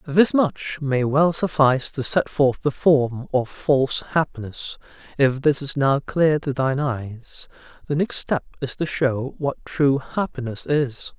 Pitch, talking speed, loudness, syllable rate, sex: 140 Hz, 165 wpm, -21 LUFS, 4.0 syllables/s, male